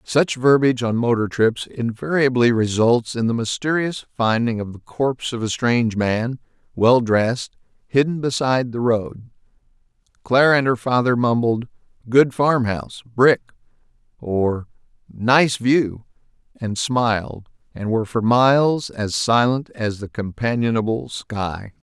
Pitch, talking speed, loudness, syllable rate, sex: 120 Hz, 125 wpm, -19 LUFS, 4.4 syllables/s, male